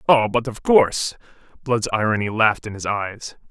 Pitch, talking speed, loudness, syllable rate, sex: 115 Hz, 170 wpm, -20 LUFS, 5.2 syllables/s, male